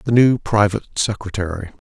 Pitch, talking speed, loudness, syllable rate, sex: 105 Hz, 130 wpm, -19 LUFS, 5.8 syllables/s, male